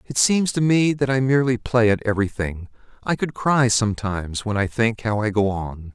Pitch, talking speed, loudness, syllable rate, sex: 115 Hz, 210 wpm, -21 LUFS, 5.3 syllables/s, male